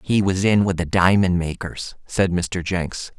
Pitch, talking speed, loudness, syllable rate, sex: 90 Hz, 190 wpm, -20 LUFS, 4.0 syllables/s, male